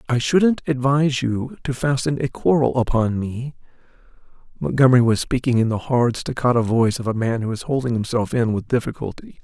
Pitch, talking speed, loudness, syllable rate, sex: 125 Hz, 180 wpm, -20 LUFS, 5.6 syllables/s, male